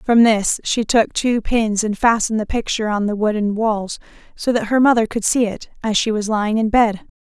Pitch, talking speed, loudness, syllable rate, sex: 220 Hz, 225 wpm, -18 LUFS, 5.3 syllables/s, female